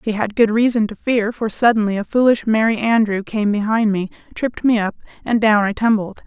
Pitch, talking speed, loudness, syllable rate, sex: 215 Hz, 210 wpm, -17 LUFS, 5.5 syllables/s, female